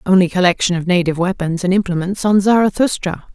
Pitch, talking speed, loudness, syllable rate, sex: 185 Hz, 160 wpm, -16 LUFS, 6.3 syllables/s, female